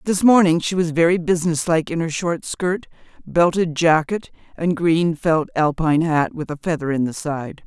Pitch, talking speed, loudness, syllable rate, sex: 165 Hz, 190 wpm, -19 LUFS, 4.8 syllables/s, female